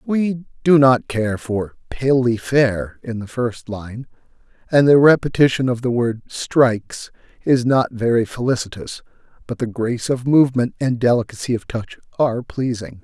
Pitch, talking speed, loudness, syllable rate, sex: 120 Hz, 150 wpm, -18 LUFS, 4.6 syllables/s, male